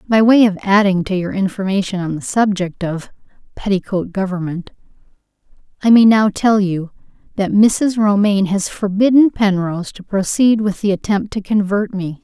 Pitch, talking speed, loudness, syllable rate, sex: 200 Hz, 155 wpm, -16 LUFS, 5.0 syllables/s, female